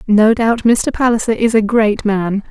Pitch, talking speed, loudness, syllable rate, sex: 220 Hz, 190 wpm, -14 LUFS, 4.3 syllables/s, female